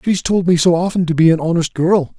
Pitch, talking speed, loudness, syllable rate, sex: 170 Hz, 275 wpm, -15 LUFS, 5.9 syllables/s, male